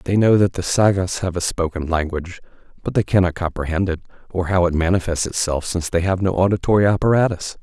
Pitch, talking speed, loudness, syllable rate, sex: 90 Hz, 195 wpm, -19 LUFS, 6.2 syllables/s, male